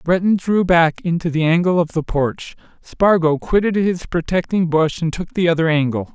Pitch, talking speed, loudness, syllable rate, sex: 170 Hz, 185 wpm, -17 LUFS, 4.9 syllables/s, male